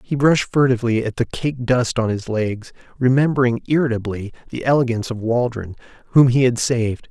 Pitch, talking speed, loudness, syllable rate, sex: 120 Hz, 170 wpm, -19 LUFS, 5.8 syllables/s, male